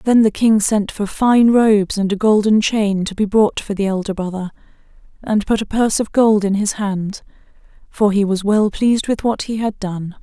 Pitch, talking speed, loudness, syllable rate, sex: 210 Hz, 215 wpm, -16 LUFS, 4.9 syllables/s, female